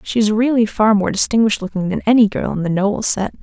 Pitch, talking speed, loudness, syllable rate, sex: 210 Hz, 245 wpm, -16 LUFS, 6.4 syllables/s, female